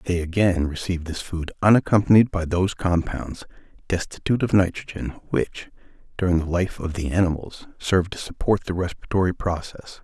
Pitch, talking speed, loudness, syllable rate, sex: 90 Hz, 150 wpm, -23 LUFS, 5.7 syllables/s, male